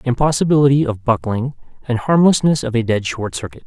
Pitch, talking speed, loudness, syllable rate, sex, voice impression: 130 Hz, 165 wpm, -17 LUFS, 5.9 syllables/s, male, masculine, adult-like, fluent, intellectual, kind